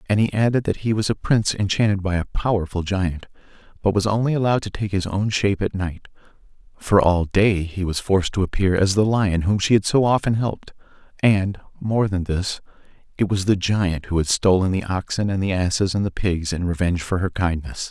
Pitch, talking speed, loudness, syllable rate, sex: 95 Hz, 220 wpm, -21 LUFS, 5.6 syllables/s, male